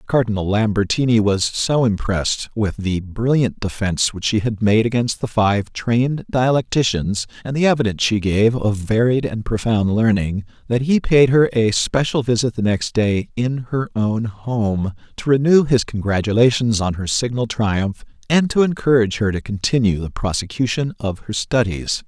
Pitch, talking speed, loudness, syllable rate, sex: 115 Hz, 165 wpm, -18 LUFS, 4.8 syllables/s, male